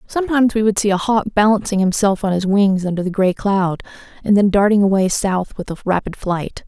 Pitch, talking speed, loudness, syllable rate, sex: 200 Hz, 205 wpm, -17 LUFS, 5.5 syllables/s, female